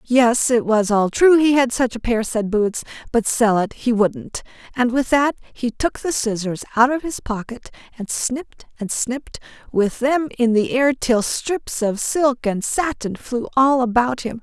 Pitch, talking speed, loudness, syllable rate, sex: 240 Hz, 195 wpm, -19 LUFS, 4.2 syllables/s, female